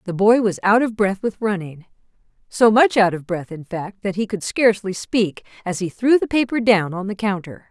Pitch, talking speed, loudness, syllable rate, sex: 205 Hz, 225 wpm, -19 LUFS, 5.1 syllables/s, female